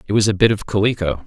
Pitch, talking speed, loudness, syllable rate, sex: 100 Hz, 285 wpm, -18 LUFS, 7.2 syllables/s, male